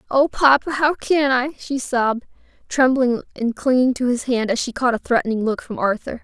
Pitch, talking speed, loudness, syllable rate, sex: 255 Hz, 200 wpm, -19 LUFS, 5.2 syllables/s, female